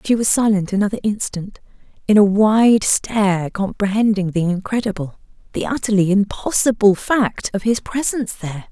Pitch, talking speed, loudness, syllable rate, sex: 205 Hz, 140 wpm, -17 LUFS, 5.1 syllables/s, female